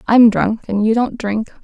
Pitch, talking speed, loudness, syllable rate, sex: 225 Hz, 220 wpm, -16 LUFS, 4.3 syllables/s, female